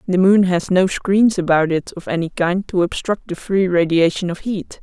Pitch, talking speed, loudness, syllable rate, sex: 185 Hz, 210 wpm, -17 LUFS, 4.7 syllables/s, female